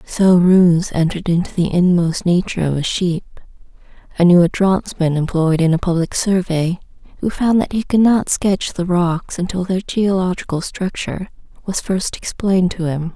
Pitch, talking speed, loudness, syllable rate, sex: 180 Hz, 170 wpm, -17 LUFS, 4.8 syllables/s, female